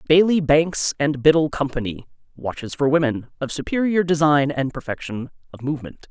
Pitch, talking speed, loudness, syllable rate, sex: 145 Hz, 145 wpm, -21 LUFS, 5.3 syllables/s, female